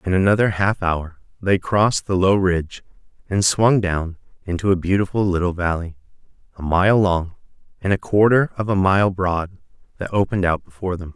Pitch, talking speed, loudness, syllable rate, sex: 95 Hz, 170 wpm, -19 LUFS, 5.4 syllables/s, male